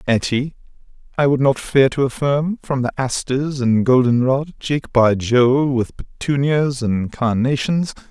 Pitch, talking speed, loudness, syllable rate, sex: 130 Hz, 150 wpm, -18 LUFS, 3.9 syllables/s, male